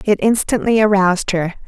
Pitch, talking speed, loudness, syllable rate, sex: 200 Hz, 145 wpm, -15 LUFS, 5.4 syllables/s, female